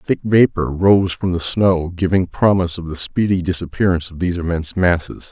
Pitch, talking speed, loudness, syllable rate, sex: 90 Hz, 180 wpm, -17 LUFS, 5.6 syllables/s, male